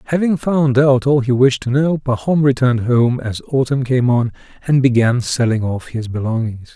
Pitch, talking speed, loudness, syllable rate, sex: 130 Hz, 185 wpm, -16 LUFS, 5.0 syllables/s, male